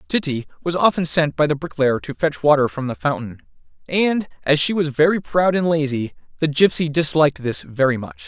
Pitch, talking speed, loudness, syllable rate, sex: 155 Hz, 195 wpm, -19 LUFS, 5.3 syllables/s, male